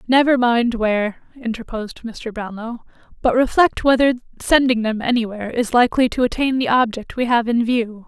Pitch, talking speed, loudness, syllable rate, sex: 235 Hz, 165 wpm, -18 LUFS, 5.4 syllables/s, female